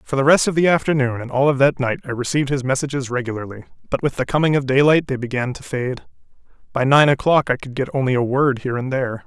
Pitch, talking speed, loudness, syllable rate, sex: 135 Hz, 245 wpm, -19 LUFS, 6.7 syllables/s, male